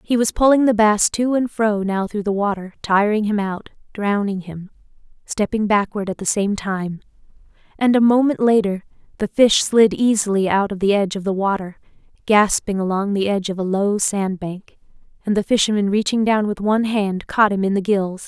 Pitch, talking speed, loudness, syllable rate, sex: 205 Hz, 190 wpm, -18 LUFS, 5.2 syllables/s, female